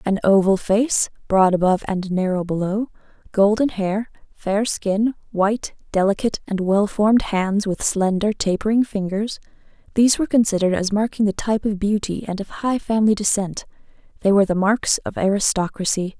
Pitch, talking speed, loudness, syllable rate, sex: 205 Hz, 155 wpm, -20 LUFS, 5.3 syllables/s, female